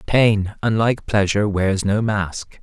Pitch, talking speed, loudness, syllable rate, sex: 105 Hz, 135 wpm, -19 LUFS, 4.2 syllables/s, male